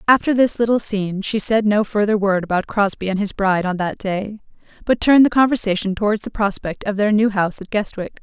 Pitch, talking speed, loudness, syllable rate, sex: 205 Hz, 220 wpm, -18 LUFS, 5.9 syllables/s, female